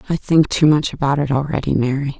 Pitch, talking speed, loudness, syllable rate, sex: 145 Hz, 220 wpm, -17 LUFS, 6.0 syllables/s, female